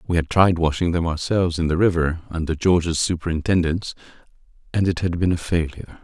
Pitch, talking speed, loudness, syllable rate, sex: 85 Hz, 180 wpm, -21 LUFS, 6.2 syllables/s, male